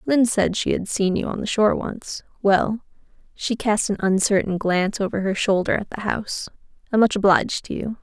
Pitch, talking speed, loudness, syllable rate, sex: 205 Hz, 185 wpm, -21 LUFS, 5.5 syllables/s, female